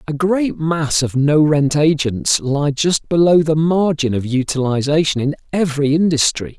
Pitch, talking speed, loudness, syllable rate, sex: 150 Hz, 155 wpm, -16 LUFS, 4.5 syllables/s, male